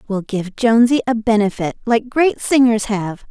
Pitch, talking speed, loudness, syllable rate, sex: 225 Hz, 165 wpm, -16 LUFS, 4.7 syllables/s, female